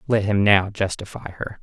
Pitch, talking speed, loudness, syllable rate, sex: 100 Hz, 185 wpm, -21 LUFS, 4.9 syllables/s, male